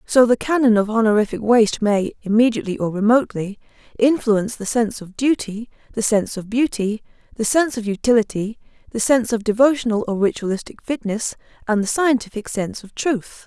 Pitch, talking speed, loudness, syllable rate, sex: 225 Hz, 160 wpm, -19 LUFS, 6.0 syllables/s, female